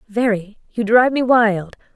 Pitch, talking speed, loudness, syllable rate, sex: 220 Hz, 155 wpm, -17 LUFS, 4.5 syllables/s, female